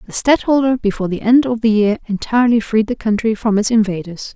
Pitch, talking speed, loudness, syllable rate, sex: 220 Hz, 205 wpm, -16 LUFS, 6.1 syllables/s, female